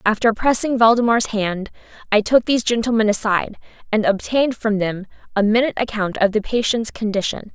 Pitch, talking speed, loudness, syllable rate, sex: 220 Hz, 160 wpm, -18 LUFS, 5.7 syllables/s, female